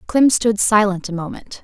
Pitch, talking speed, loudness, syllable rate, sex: 205 Hz, 185 wpm, -17 LUFS, 4.8 syllables/s, female